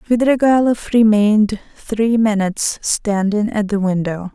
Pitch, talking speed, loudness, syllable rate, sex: 215 Hz, 110 wpm, -16 LUFS, 4.2 syllables/s, female